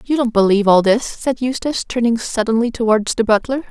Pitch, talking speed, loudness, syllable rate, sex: 230 Hz, 195 wpm, -16 LUFS, 5.9 syllables/s, female